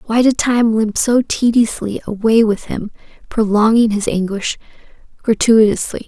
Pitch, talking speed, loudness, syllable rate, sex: 220 Hz, 130 wpm, -15 LUFS, 4.6 syllables/s, female